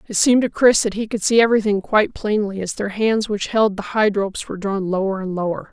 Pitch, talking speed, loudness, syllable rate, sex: 205 Hz, 250 wpm, -19 LUFS, 6.1 syllables/s, female